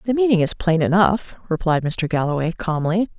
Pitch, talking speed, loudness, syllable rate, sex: 180 Hz, 170 wpm, -20 LUFS, 5.4 syllables/s, female